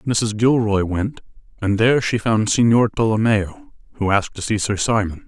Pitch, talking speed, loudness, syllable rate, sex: 110 Hz, 170 wpm, -19 LUFS, 5.1 syllables/s, male